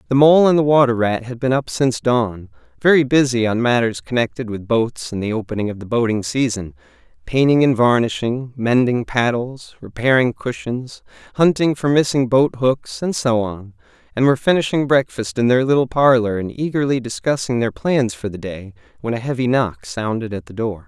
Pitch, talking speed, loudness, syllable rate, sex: 120 Hz, 185 wpm, -18 LUFS, 5.2 syllables/s, male